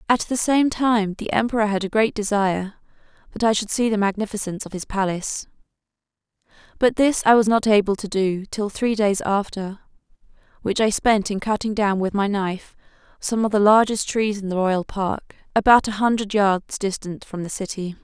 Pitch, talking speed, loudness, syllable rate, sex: 205 Hz, 190 wpm, -21 LUFS, 5.3 syllables/s, female